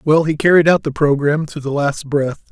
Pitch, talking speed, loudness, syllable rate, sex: 150 Hz, 240 wpm, -16 LUFS, 5.5 syllables/s, male